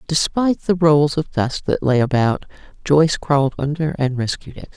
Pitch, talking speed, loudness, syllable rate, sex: 150 Hz, 175 wpm, -18 LUFS, 5.1 syllables/s, female